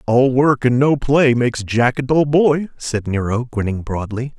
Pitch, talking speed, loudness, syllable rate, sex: 125 Hz, 190 wpm, -17 LUFS, 4.4 syllables/s, male